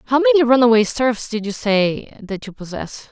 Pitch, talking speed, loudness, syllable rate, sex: 230 Hz, 190 wpm, -16 LUFS, 4.9 syllables/s, female